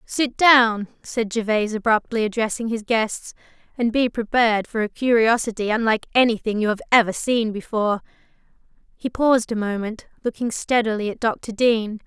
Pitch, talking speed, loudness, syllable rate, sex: 225 Hz, 150 wpm, -21 LUFS, 5.3 syllables/s, female